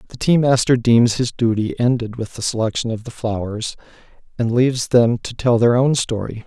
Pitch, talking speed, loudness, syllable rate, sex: 120 Hz, 195 wpm, -18 LUFS, 5.2 syllables/s, male